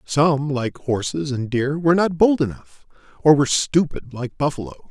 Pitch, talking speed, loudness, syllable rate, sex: 145 Hz, 170 wpm, -20 LUFS, 4.9 syllables/s, male